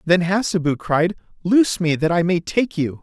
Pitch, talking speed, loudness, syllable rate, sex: 175 Hz, 200 wpm, -19 LUFS, 4.9 syllables/s, male